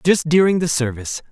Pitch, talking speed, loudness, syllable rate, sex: 155 Hz, 185 wpm, -18 LUFS, 6.0 syllables/s, male